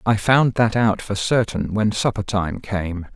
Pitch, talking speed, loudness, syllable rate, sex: 105 Hz, 190 wpm, -20 LUFS, 4.0 syllables/s, male